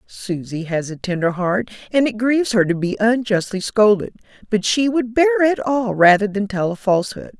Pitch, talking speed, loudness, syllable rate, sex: 210 Hz, 195 wpm, -18 LUFS, 5.0 syllables/s, female